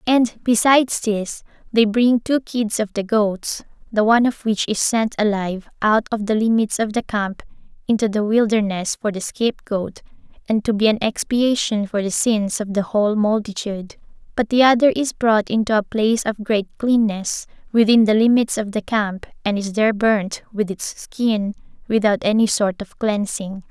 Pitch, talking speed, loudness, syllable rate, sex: 215 Hz, 180 wpm, -19 LUFS, 4.8 syllables/s, female